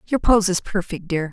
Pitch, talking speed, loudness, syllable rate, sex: 185 Hz, 225 wpm, -20 LUFS, 5.1 syllables/s, female